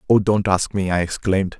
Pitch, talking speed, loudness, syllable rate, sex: 95 Hz, 225 wpm, -19 LUFS, 5.7 syllables/s, male